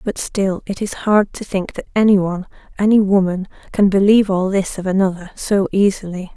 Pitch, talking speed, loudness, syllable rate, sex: 195 Hz, 170 wpm, -17 LUFS, 5.4 syllables/s, female